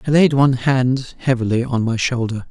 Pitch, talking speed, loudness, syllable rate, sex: 125 Hz, 190 wpm, -17 LUFS, 5.2 syllables/s, male